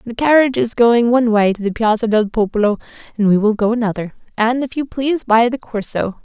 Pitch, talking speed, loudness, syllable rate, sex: 225 Hz, 220 wpm, -16 LUFS, 6.0 syllables/s, female